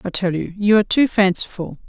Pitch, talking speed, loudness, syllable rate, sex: 195 Hz, 225 wpm, -18 LUFS, 6.0 syllables/s, female